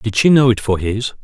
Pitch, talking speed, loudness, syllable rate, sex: 115 Hz, 290 wpm, -15 LUFS, 5.3 syllables/s, male